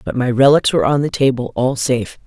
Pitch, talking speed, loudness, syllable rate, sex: 130 Hz, 240 wpm, -15 LUFS, 6.2 syllables/s, female